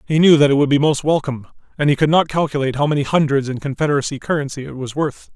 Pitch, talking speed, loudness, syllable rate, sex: 145 Hz, 245 wpm, -17 LUFS, 7.2 syllables/s, male